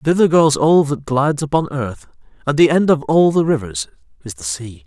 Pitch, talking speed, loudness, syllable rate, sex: 140 Hz, 210 wpm, -16 LUFS, 5.2 syllables/s, male